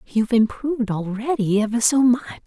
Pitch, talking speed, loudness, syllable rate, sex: 235 Hz, 145 wpm, -20 LUFS, 5.7 syllables/s, female